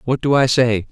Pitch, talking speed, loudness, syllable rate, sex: 125 Hz, 260 wpm, -16 LUFS, 5.1 syllables/s, male